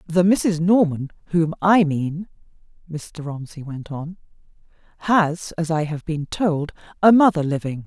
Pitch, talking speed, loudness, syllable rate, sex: 165 Hz, 145 wpm, -20 LUFS, 4.1 syllables/s, female